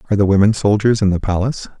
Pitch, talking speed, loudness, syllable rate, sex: 100 Hz, 235 wpm, -15 LUFS, 8.0 syllables/s, male